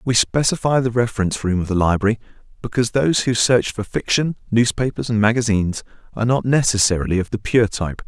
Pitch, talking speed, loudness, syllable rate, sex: 115 Hz, 180 wpm, -19 LUFS, 6.4 syllables/s, male